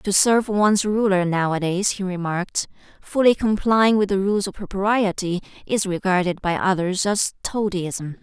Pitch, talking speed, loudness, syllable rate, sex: 195 Hz, 145 wpm, -21 LUFS, 4.7 syllables/s, female